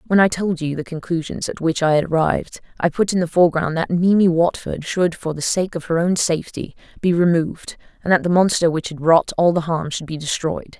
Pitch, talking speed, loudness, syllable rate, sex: 170 Hz, 230 wpm, -19 LUFS, 5.7 syllables/s, female